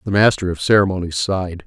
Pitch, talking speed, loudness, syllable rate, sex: 95 Hz, 180 wpm, -18 LUFS, 6.5 syllables/s, male